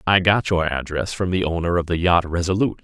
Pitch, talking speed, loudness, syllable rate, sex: 90 Hz, 235 wpm, -20 LUFS, 6.0 syllables/s, male